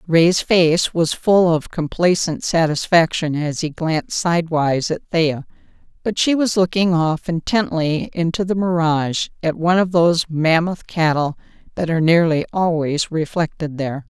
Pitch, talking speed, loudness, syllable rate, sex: 165 Hz, 145 wpm, -18 LUFS, 4.6 syllables/s, female